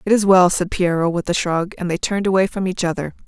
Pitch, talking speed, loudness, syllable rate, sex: 180 Hz, 275 wpm, -18 LUFS, 6.3 syllables/s, female